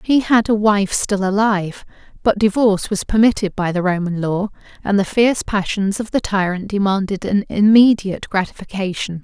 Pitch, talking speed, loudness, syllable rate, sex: 200 Hz, 160 wpm, -17 LUFS, 5.2 syllables/s, female